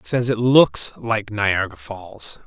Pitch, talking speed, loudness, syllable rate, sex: 105 Hz, 145 wpm, -19 LUFS, 3.6 syllables/s, male